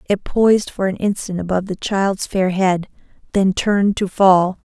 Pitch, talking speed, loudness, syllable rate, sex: 195 Hz, 165 wpm, -18 LUFS, 4.7 syllables/s, female